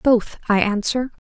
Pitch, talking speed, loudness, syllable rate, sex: 225 Hz, 140 wpm, -20 LUFS, 3.9 syllables/s, female